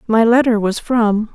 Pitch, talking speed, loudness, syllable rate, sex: 225 Hz, 180 wpm, -15 LUFS, 4.3 syllables/s, female